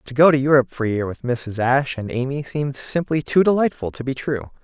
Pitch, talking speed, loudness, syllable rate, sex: 135 Hz, 245 wpm, -20 LUFS, 6.1 syllables/s, male